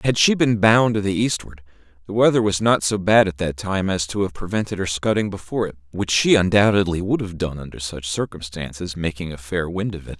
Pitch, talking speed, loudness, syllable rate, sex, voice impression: 95 Hz, 230 wpm, -20 LUFS, 5.7 syllables/s, male, masculine, slightly middle-aged, sincere, calm, slightly mature, elegant